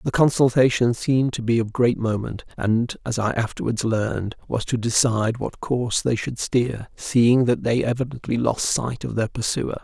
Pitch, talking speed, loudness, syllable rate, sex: 120 Hz, 185 wpm, -22 LUFS, 4.8 syllables/s, male